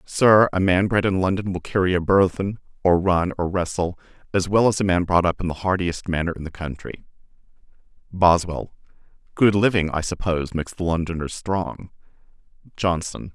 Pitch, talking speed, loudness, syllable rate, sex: 90 Hz, 170 wpm, -21 LUFS, 5.3 syllables/s, male